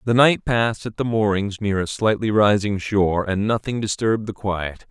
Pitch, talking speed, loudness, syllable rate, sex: 105 Hz, 195 wpm, -21 LUFS, 5.0 syllables/s, male